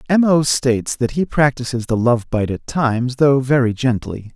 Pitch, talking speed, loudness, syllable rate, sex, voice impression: 125 Hz, 195 wpm, -17 LUFS, 4.8 syllables/s, male, masculine, adult-like, slightly thick, tensed, powerful, bright, soft, intellectual, refreshing, calm, friendly, reassuring, slightly wild, lively, kind